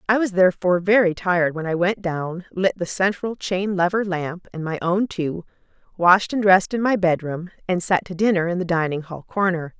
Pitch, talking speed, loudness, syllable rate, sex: 180 Hz, 210 wpm, -21 LUFS, 5.3 syllables/s, female